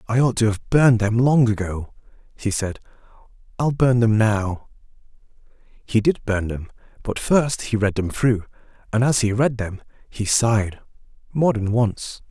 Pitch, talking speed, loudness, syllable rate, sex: 115 Hz, 165 wpm, -20 LUFS, 4.5 syllables/s, male